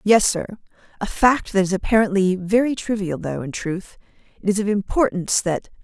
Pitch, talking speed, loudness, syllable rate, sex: 200 Hz, 175 wpm, -20 LUFS, 5.5 syllables/s, female